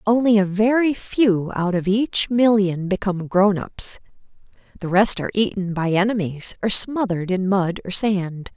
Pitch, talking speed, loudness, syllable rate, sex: 200 Hz, 155 wpm, -20 LUFS, 4.6 syllables/s, female